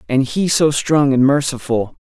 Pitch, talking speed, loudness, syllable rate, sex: 135 Hz, 180 wpm, -16 LUFS, 4.4 syllables/s, male